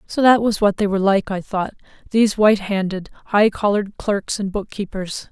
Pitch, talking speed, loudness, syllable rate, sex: 200 Hz, 190 wpm, -19 LUFS, 5.4 syllables/s, female